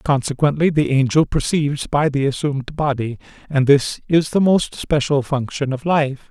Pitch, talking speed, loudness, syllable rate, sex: 145 Hz, 160 wpm, -18 LUFS, 4.8 syllables/s, male